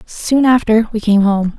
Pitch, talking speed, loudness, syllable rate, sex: 220 Hz, 190 wpm, -13 LUFS, 4.1 syllables/s, female